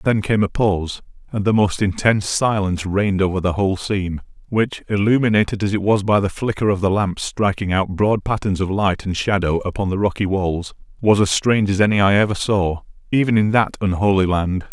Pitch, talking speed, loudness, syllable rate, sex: 100 Hz, 205 wpm, -19 LUFS, 5.7 syllables/s, male